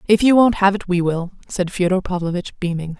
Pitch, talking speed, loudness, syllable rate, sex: 185 Hz, 220 wpm, -18 LUFS, 5.7 syllables/s, female